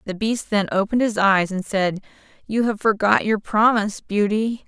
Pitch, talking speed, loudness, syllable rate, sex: 210 Hz, 180 wpm, -20 LUFS, 4.9 syllables/s, female